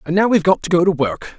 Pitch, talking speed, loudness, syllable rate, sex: 175 Hz, 345 wpm, -16 LUFS, 7.2 syllables/s, male